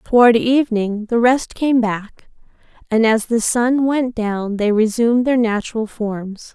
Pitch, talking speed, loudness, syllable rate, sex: 230 Hz, 155 wpm, -17 LUFS, 4.1 syllables/s, female